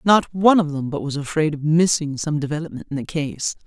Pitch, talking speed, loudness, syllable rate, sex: 155 Hz, 230 wpm, -21 LUFS, 5.8 syllables/s, female